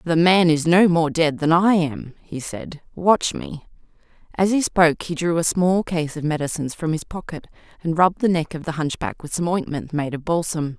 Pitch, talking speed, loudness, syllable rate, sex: 165 Hz, 215 wpm, -20 LUFS, 5.1 syllables/s, female